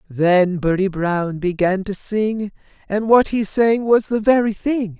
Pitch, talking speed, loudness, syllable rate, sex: 200 Hz, 170 wpm, -18 LUFS, 3.8 syllables/s, male